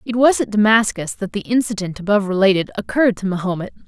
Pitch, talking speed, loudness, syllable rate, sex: 210 Hz, 185 wpm, -18 LUFS, 6.7 syllables/s, female